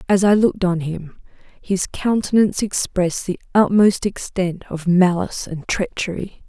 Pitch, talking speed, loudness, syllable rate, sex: 185 Hz, 140 wpm, -19 LUFS, 4.9 syllables/s, female